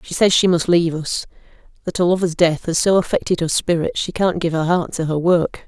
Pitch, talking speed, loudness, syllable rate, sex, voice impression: 170 Hz, 245 wpm, -18 LUFS, 5.6 syllables/s, female, very feminine, very middle-aged, slightly thin, tensed, slightly powerful, bright, very hard, very clear, very fluent, raspy, slightly cute, very intellectual, slightly refreshing, very sincere, very calm, friendly, reassuring, very unique, very elegant, very sweet, lively, very kind, very modest, light